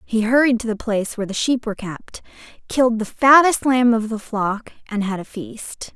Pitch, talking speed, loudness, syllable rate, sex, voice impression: 225 Hz, 210 wpm, -19 LUFS, 5.2 syllables/s, female, very feminine, very young, very thin, very tensed, powerful, bright, soft, very clear, fluent, slightly raspy, very cute, slightly intellectual, very refreshing, sincere, slightly calm, friendly, reassuring, very unique, very elegant, wild, sweet, very lively, slightly kind, intense, very sharp, very light